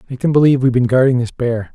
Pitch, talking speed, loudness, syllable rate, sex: 125 Hz, 275 wpm, -15 LUFS, 7.7 syllables/s, male